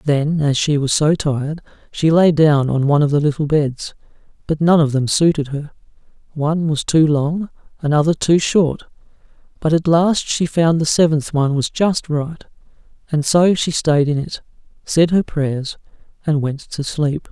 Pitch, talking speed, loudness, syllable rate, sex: 155 Hz, 180 wpm, -17 LUFS, 4.6 syllables/s, male